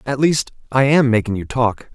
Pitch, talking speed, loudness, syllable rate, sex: 125 Hz, 215 wpm, -17 LUFS, 4.9 syllables/s, male